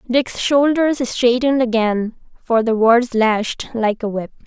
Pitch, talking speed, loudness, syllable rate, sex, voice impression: 240 Hz, 150 wpm, -17 LUFS, 3.9 syllables/s, female, feminine, slightly gender-neutral, slightly young, powerful, soft, halting, calm, friendly, slightly reassuring, unique, lively, kind, slightly modest